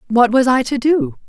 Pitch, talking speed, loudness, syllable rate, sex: 245 Hz, 235 wpm, -15 LUFS, 4.9 syllables/s, female